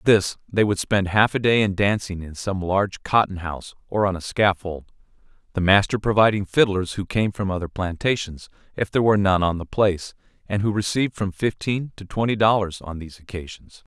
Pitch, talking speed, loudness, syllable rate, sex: 100 Hz, 200 wpm, -22 LUFS, 5.7 syllables/s, male